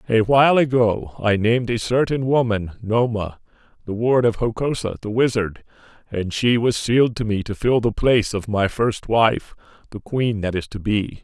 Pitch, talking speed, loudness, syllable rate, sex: 110 Hz, 185 wpm, -20 LUFS, 4.9 syllables/s, male